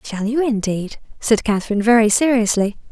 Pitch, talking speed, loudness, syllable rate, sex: 225 Hz, 145 wpm, -17 LUFS, 5.6 syllables/s, female